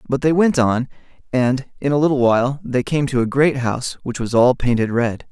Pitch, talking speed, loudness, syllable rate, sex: 130 Hz, 225 wpm, -18 LUFS, 5.3 syllables/s, male